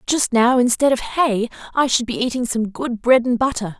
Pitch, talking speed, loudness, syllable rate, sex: 240 Hz, 220 wpm, -18 LUFS, 5.0 syllables/s, female